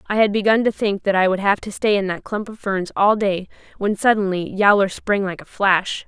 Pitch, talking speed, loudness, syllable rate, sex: 200 Hz, 245 wpm, -19 LUFS, 5.2 syllables/s, female